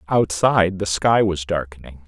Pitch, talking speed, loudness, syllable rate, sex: 90 Hz, 145 wpm, -19 LUFS, 4.7 syllables/s, male